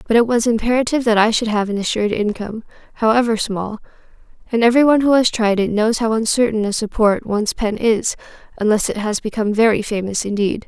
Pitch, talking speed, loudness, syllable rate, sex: 220 Hz, 195 wpm, -17 LUFS, 6.4 syllables/s, female